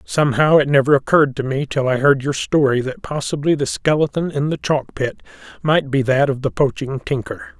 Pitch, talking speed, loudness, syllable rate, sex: 140 Hz, 205 wpm, -18 LUFS, 5.4 syllables/s, male